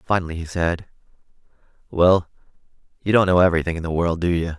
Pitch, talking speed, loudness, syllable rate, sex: 85 Hz, 170 wpm, -20 LUFS, 6.5 syllables/s, male